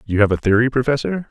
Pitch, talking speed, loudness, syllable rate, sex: 120 Hz, 230 wpm, -17 LUFS, 6.8 syllables/s, male